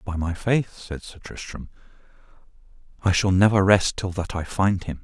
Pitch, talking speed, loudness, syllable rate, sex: 95 Hz, 180 wpm, -22 LUFS, 4.7 syllables/s, male